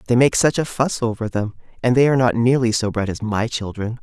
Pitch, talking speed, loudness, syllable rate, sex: 115 Hz, 255 wpm, -19 LUFS, 5.9 syllables/s, male